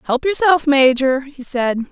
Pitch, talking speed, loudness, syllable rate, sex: 275 Hz, 155 wpm, -16 LUFS, 4.2 syllables/s, female